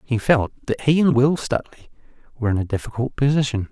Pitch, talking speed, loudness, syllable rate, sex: 125 Hz, 195 wpm, -20 LUFS, 6.8 syllables/s, male